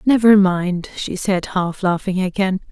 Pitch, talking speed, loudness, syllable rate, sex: 190 Hz, 155 wpm, -18 LUFS, 4.1 syllables/s, female